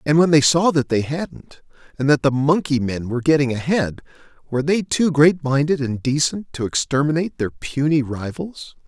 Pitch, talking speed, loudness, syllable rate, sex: 145 Hz, 185 wpm, -19 LUFS, 5.1 syllables/s, male